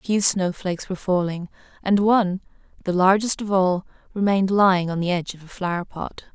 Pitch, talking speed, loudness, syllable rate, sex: 185 Hz, 200 wpm, -21 LUFS, 6.1 syllables/s, female